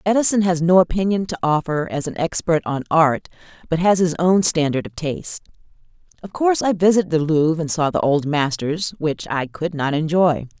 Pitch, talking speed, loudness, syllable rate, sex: 165 Hz, 190 wpm, -19 LUFS, 5.4 syllables/s, female